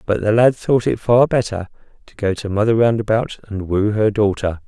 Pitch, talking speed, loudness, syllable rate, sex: 110 Hz, 205 wpm, -17 LUFS, 5.2 syllables/s, male